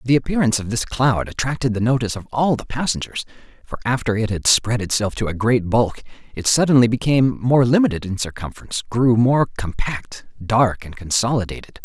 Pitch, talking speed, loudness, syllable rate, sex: 115 Hz, 175 wpm, -19 LUFS, 5.8 syllables/s, male